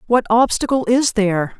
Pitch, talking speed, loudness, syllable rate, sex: 225 Hz, 150 wpm, -16 LUFS, 5.1 syllables/s, female